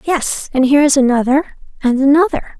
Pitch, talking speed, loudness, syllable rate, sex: 280 Hz, 140 wpm, -14 LUFS, 5.5 syllables/s, female